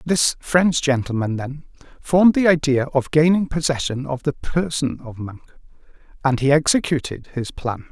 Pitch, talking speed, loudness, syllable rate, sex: 145 Hz, 150 wpm, -19 LUFS, 4.7 syllables/s, male